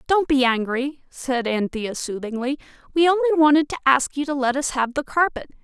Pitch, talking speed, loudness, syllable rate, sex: 275 Hz, 190 wpm, -21 LUFS, 5.3 syllables/s, female